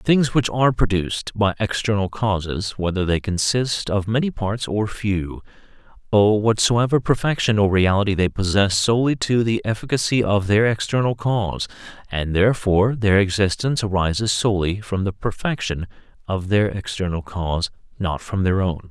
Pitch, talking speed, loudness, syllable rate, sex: 105 Hz, 150 wpm, -20 LUFS, 5.1 syllables/s, male